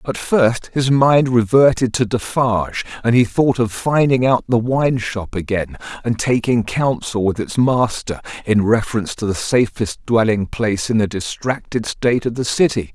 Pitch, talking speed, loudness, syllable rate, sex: 115 Hz, 170 wpm, -17 LUFS, 4.6 syllables/s, male